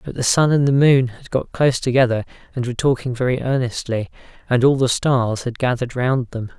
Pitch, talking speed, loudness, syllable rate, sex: 125 Hz, 210 wpm, -19 LUFS, 5.8 syllables/s, male